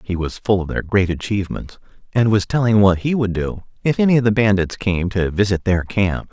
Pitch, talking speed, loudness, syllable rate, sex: 100 Hz, 230 wpm, -18 LUFS, 5.4 syllables/s, male